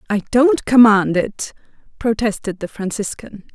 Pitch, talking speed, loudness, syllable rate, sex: 215 Hz, 120 wpm, -17 LUFS, 4.4 syllables/s, female